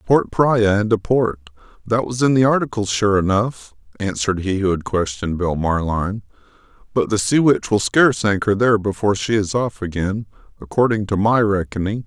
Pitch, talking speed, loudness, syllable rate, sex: 105 Hz, 180 wpm, -18 LUFS, 5.4 syllables/s, male